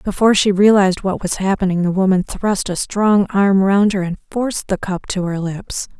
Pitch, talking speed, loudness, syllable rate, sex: 195 Hz, 210 wpm, -17 LUFS, 5.1 syllables/s, female